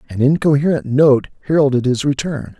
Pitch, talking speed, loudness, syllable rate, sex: 140 Hz, 140 wpm, -16 LUFS, 5.4 syllables/s, male